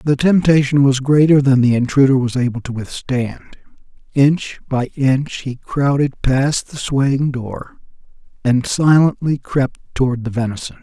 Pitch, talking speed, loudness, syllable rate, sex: 135 Hz, 145 wpm, -16 LUFS, 4.3 syllables/s, male